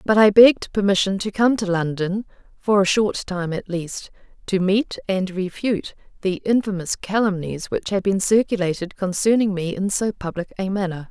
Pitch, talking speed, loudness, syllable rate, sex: 195 Hz, 175 wpm, -21 LUFS, 5.0 syllables/s, female